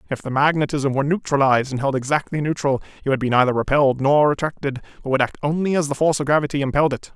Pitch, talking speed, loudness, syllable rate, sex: 140 Hz, 225 wpm, -20 LUFS, 7.3 syllables/s, male